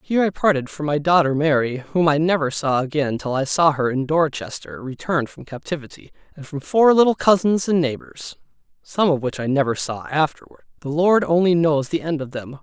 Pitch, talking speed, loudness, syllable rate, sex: 150 Hz, 205 wpm, -20 LUFS, 3.9 syllables/s, male